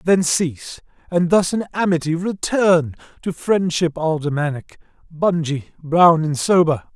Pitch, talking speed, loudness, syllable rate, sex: 170 Hz, 120 wpm, -18 LUFS, 4.3 syllables/s, male